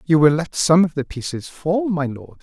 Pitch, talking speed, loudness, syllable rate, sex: 155 Hz, 245 wpm, -19 LUFS, 5.0 syllables/s, male